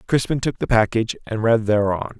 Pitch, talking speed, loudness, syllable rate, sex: 115 Hz, 190 wpm, -20 LUFS, 5.6 syllables/s, male